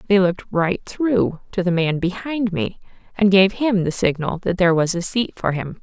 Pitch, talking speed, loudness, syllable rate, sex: 190 Hz, 215 wpm, -20 LUFS, 5.0 syllables/s, female